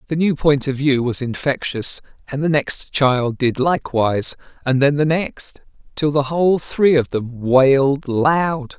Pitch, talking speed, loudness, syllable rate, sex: 140 Hz, 170 wpm, -18 LUFS, 4.2 syllables/s, male